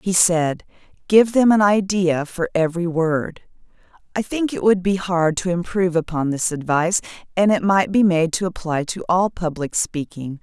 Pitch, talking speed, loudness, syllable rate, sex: 180 Hz, 180 wpm, -19 LUFS, 4.8 syllables/s, female